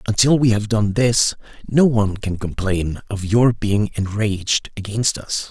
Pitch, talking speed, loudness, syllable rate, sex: 105 Hz, 165 wpm, -19 LUFS, 4.3 syllables/s, male